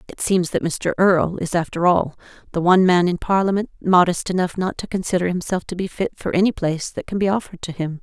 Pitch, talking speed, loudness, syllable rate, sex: 180 Hz, 230 wpm, -20 LUFS, 6.2 syllables/s, female